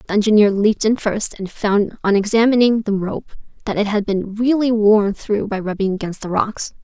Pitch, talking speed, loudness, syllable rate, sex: 210 Hz, 200 wpm, -17 LUFS, 5.1 syllables/s, female